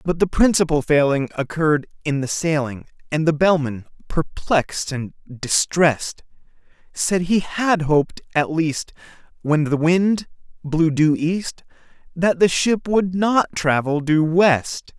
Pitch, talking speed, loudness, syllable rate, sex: 160 Hz, 135 wpm, -19 LUFS, 4.0 syllables/s, male